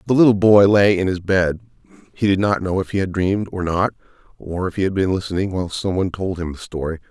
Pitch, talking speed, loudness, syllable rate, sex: 95 Hz, 245 wpm, -19 LUFS, 6.3 syllables/s, male